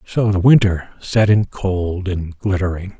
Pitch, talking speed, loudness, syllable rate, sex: 95 Hz, 160 wpm, -17 LUFS, 3.9 syllables/s, male